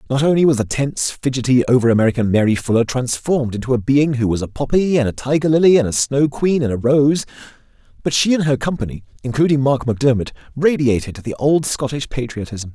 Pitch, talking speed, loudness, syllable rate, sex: 130 Hz, 200 wpm, -17 LUFS, 6.0 syllables/s, male